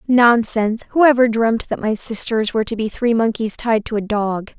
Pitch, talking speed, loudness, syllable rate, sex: 225 Hz, 210 wpm, -17 LUFS, 5.1 syllables/s, female